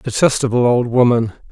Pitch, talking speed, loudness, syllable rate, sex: 120 Hz, 120 wpm, -15 LUFS, 5.3 syllables/s, male